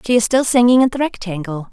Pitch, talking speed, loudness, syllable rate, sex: 225 Hz, 245 wpm, -16 LUFS, 6.3 syllables/s, female